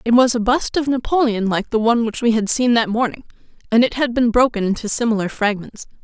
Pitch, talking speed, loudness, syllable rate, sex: 230 Hz, 230 wpm, -18 LUFS, 6.0 syllables/s, female